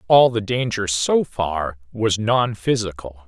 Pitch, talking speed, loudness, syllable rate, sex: 105 Hz, 130 wpm, -20 LUFS, 4.2 syllables/s, male